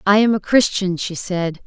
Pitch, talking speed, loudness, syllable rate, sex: 195 Hz, 215 wpm, -18 LUFS, 4.6 syllables/s, female